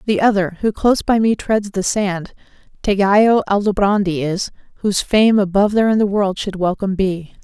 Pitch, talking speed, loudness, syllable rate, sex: 200 Hz, 175 wpm, -17 LUFS, 5.4 syllables/s, female